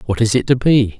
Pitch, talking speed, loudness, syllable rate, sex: 115 Hz, 305 wpm, -15 LUFS, 5.9 syllables/s, male